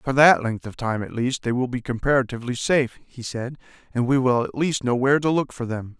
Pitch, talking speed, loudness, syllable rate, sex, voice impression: 125 Hz, 250 wpm, -22 LUFS, 5.9 syllables/s, male, masculine, adult-like, tensed, bright, slightly soft, clear, cool, intellectual, calm, friendly, wild, slightly lively, slightly kind, modest